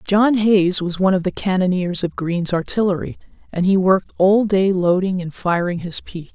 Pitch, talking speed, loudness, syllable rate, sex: 185 Hz, 190 wpm, -18 LUFS, 5.4 syllables/s, female